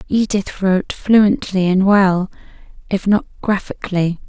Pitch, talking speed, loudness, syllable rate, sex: 195 Hz, 110 wpm, -16 LUFS, 4.2 syllables/s, female